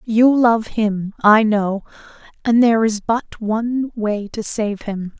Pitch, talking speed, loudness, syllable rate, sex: 220 Hz, 160 wpm, -18 LUFS, 3.6 syllables/s, female